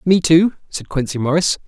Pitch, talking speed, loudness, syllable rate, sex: 155 Hz, 180 wpm, -16 LUFS, 5.1 syllables/s, male